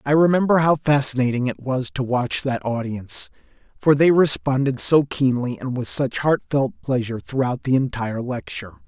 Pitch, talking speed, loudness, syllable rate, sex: 135 Hz, 160 wpm, -20 LUFS, 5.2 syllables/s, male